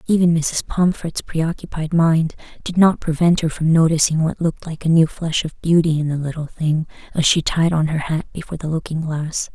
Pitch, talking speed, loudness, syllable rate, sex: 160 Hz, 205 wpm, -19 LUFS, 5.3 syllables/s, female